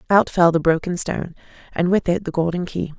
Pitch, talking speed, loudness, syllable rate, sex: 175 Hz, 220 wpm, -20 LUFS, 5.9 syllables/s, female